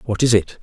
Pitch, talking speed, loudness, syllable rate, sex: 110 Hz, 290 wpm, -17 LUFS, 5.1 syllables/s, male